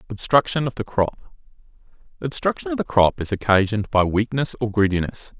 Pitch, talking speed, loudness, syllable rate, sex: 105 Hz, 145 wpm, -21 LUFS, 5.6 syllables/s, male